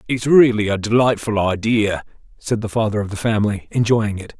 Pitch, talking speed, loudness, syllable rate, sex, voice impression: 110 Hz, 180 wpm, -18 LUFS, 5.5 syllables/s, male, masculine, adult-like, tensed, slightly powerful, bright, clear, fluent, intellectual, sincere, calm, slightly wild, slightly strict